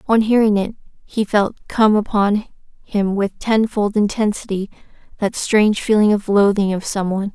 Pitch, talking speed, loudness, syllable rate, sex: 205 Hz, 145 wpm, -18 LUFS, 4.9 syllables/s, female